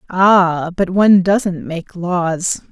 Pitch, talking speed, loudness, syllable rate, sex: 180 Hz, 135 wpm, -15 LUFS, 2.9 syllables/s, female